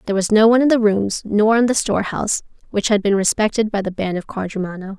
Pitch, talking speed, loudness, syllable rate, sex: 205 Hz, 240 wpm, -18 LUFS, 6.6 syllables/s, female